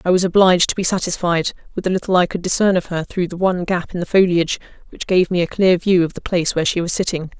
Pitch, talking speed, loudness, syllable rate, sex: 180 Hz, 275 wpm, -18 LUFS, 6.8 syllables/s, female